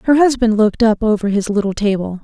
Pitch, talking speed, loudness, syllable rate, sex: 215 Hz, 215 wpm, -15 LUFS, 6.3 syllables/s, female